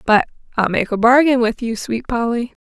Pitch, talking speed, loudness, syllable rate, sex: 235 Hz, 205 wpm, -17 LUFS, 5.2 syllables/s, female